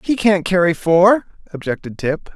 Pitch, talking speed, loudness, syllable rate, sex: 180 Hz, 155 wpm, -16 LUFS, 4.5 syllables/s, male